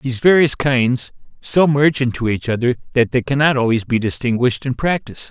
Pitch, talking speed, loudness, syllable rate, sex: 130 Hz, 180 wpm, -17 LUFS, 5.8 syllables/s, male